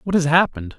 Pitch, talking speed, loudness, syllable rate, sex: 155 Hz, 230 wpm, -18 LUFS, 7.3 syllables/s, male